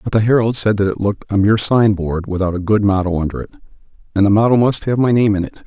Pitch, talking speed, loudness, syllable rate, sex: 105 Hz, 275 wpm, -16 LUFS, 6.6 syllables/s, male